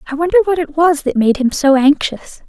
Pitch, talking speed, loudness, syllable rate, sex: 295 Hz, 240 wpm, -14 LUFS, 5.6 syllables/s, female